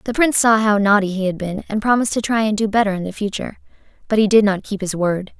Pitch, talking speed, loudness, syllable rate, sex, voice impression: 210 Hz, 265 wpm, -18 LUFS, 6.6 syllables/s, female, very feminine, slightly young, adult-like, very thin, very tensed, slightly powerful, very bright, very hard, very clear, very fluent, very cute, intellectual, very refreshing, sincere, calm, very friendly, very reassuring, very unique, elegant, slightly wild, very sweet, very lively, kind, slightly intense, sharp, very light